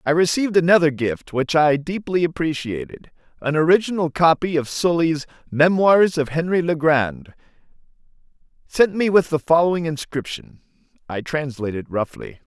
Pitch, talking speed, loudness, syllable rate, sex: 160 Hz, 135 wpm, -19 LUFS, 4.7 syllables/s, male